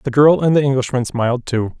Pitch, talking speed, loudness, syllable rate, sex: 130 Hz, 235 wpm, -16 LUFS, 6.1 syllables/s, male